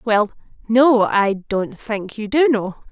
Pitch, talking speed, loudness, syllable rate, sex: 220 Hz, 165 wpm, -18 LUFS, 3.5 syllables/s, female